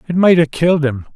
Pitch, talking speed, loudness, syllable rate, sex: 160 Hz, 210 wpm, -14 LUFS, 6.5 syllables/s, male